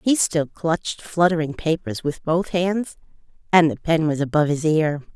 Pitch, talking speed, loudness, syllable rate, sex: 160 Hz, 175 wpm, -21 LUFS, 4.8 syllables/s, female